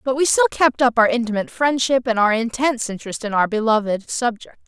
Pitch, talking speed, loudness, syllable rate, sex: 240 Hz, 205 wpm, -19 LUFS, 6.1 syllables/s, female